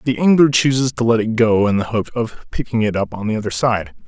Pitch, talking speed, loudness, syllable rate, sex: 115 Hz, 265 wpm, -17 LUFS, 5.9 syllables/s, male